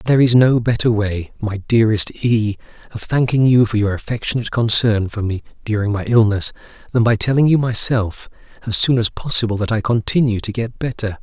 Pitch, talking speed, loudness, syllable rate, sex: 110 Hz, 185 wpm, -17 LUFS, 5.6 syllables/s, male